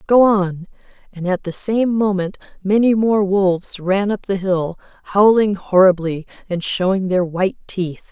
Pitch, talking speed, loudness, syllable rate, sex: 195 Hz, 155 wpm, -17 LUFS, 4.4 syllables/s, female